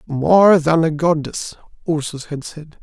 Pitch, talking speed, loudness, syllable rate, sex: 155 Hz, 150 wpm, -16 LUFS, 3.9 syllables/s, male